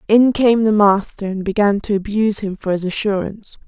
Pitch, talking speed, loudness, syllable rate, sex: 205 Hz, 195 wpm, -17 LUFS, 5.6 syllables/s, female